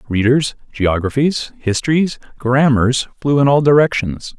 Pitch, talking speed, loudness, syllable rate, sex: 130 Hz, 110 wpm, -16 LUFS, 4.3 syllables/s, male